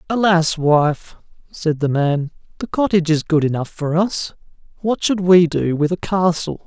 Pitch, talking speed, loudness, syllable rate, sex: 170 Hz, 170 wpm, -18 LUFS, 4.5 syllables/s, male